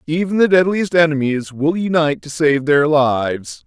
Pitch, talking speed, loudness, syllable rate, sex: 150 Hz, 165 wpm, -16 LUFS, 4.9 syllables/s, male